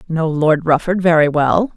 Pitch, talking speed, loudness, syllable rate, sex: 165 Hz, 170 wpm, -15 LUFS, 4.5 syllables/s, female